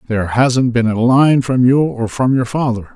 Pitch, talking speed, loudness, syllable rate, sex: 125 Hz, 225 wpm, -14 LUFS, 4.7 syllables/s, male